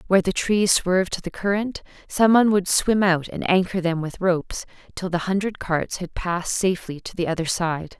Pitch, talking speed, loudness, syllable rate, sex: 185 Hz, 210 wpm, -22 LUFS, 5.4 syllables/s, female